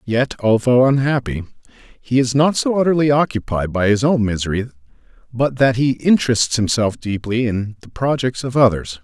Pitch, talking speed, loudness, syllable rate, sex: 120 Hz, 160 wpm, -17 LUFS, 5.1 syllables/s, male